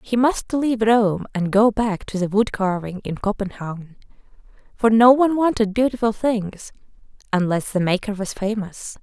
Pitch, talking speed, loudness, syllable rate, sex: 210 Hz, 160 wpm, -20 LUFS, 4.8 syllables/s, female